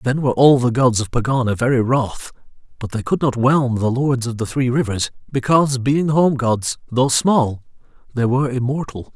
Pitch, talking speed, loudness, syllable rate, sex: 125 Hz, 190 wpm, -18 LUFS, 5.0 syllables/s, male